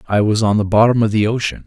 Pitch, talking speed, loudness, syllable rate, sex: 105 Hz, 290 wpm, -15 LUFS, 6.7 syllables/s, male